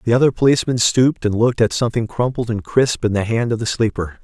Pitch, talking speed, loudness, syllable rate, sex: 115 Hz, 240 wpm, -17 LUFS, 6.6 syllables/s, male